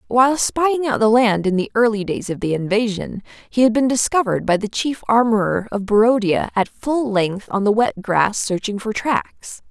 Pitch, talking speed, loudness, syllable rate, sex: 220 Hz, 200 wpm, -18 LUFS, 4.8 syllables/s, female